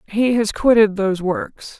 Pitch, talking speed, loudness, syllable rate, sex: 210 Hz, 165 wpm, -17 LUFS, 4.3 syllables/s, female